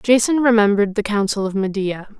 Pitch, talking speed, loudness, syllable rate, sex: 210 Hz, 165 wpm, -18 LUFS, 5.8 syllables/s, female